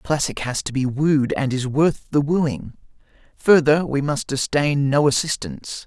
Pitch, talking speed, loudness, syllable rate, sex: 140 Hz, 175 wpm, -20 LUFS, 4.5 syllables/s, male